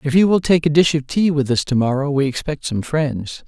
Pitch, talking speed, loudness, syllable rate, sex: 145 Hz, 275 wpm, -18 LUFS, 5.3 syllables/s, male